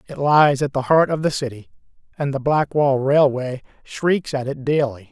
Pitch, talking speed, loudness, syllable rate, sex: 140 Hz, 190 wpm, -19 LUFS, 4.7 syllables/s, male